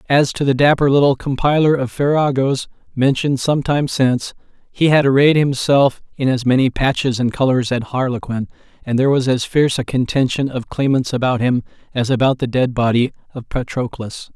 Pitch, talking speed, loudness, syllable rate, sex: 130 Hz, 175 wpm, -17 LUFS, 5.5 syllables/s, male